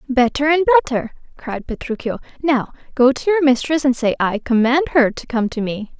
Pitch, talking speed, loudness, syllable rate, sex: 260 Hz, 190 wpm, -18 LUFS, 5.3 syllables/s, female